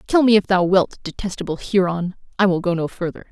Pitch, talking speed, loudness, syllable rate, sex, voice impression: 185 Hz, 215 wpm, -19 LUFS, 5.9 syllables/s, female, feminine, adult-like, tensed, clear, fluent, intellectual, slightly friendly, elegant, lively, slightly strict, slightly sharp